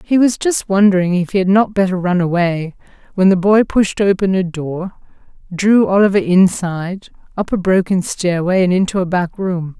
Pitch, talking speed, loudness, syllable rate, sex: 185 Hz, 185 wpm, -15 LUFS, 5.0 syllables/s, female